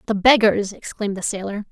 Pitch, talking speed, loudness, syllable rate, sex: 205 Hz, 175 wpm, -19 LUFS, 5.9 syllables/s, female